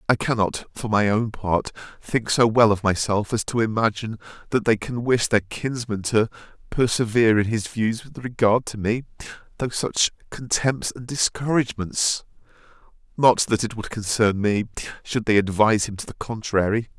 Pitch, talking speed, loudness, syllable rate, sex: 110 Hz, 165 wpm, -22 LUFS, 5.0 syllables/s, male